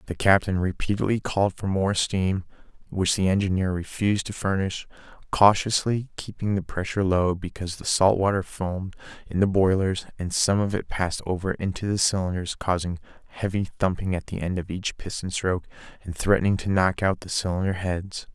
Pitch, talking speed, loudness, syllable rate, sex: 95 Hz, 175 wpm, -25 LUFS, 5.5 syllables/s, male